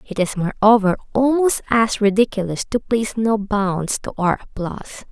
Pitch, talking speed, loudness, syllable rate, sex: 210 Hz, 155 wpm, -19 LUFS, 5.9 syllables/s, female